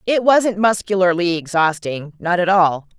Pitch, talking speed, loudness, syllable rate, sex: 180 Hz, 120 wpm, -17 LUFS, 4.4 syllables/s, female